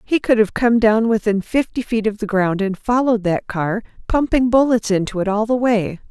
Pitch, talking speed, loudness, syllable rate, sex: 220 Hz, 215 wpm, -18 LUFS, 5.1 syllables/s, female